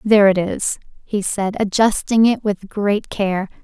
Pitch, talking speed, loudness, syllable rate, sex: 205 Hz, 165 wpm, -18 LUFS, 4.1 syllables/s, female